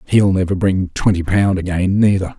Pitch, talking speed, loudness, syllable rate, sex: 95 Hz, 175 wpm, -16 LUFS, 4.9 syllables/s, male